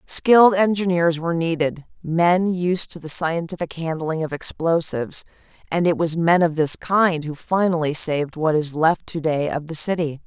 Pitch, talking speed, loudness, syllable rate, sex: 165 Hz, 175 wpm, -20 LUFS, 4.7 syllables/s, female